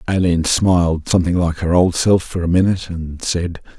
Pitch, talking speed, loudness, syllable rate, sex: 85 Hz, 190 wpm, -17 LUFS, 5.2 syllables/s, male